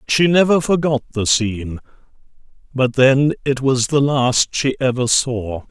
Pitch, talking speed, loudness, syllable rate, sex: 130 Hz, 145 wpm, -17 LUFS, 4.2 syllables/s, male